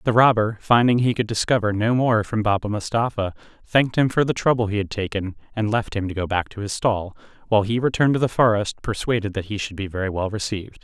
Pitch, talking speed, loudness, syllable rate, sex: 110 Hz, 235 wpm, -21 LUFS, 6.2 syllables/s, male